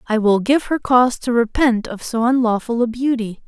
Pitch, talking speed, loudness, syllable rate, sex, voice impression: 235 Hz, 205 wpm, -18 LUFS, 5.1 syllables/s, female, very feminine, young, slightly adult-like, very thin, slightly tensed, bright, soft, very clear, very fluent, very cute, intellectual, slightly refreshing, sincere, slightly calm, friendly, slightly reassuring, slightly elegant, slightly sweet, kind, slightly light